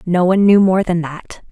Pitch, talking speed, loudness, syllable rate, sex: 180 Hz, 240 wpm, -14 LUFS, 5.1 syllables/s, female